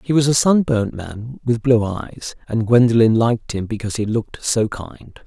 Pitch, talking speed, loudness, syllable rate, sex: 115 Hz, 195 wpm, -18 LUFS, 4.8 syllables/s, male